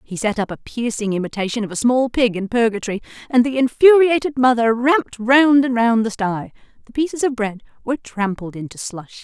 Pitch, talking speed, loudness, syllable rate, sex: 235 Hz, 195 wpm, -18 LUFS, 5.6 syllables/s, female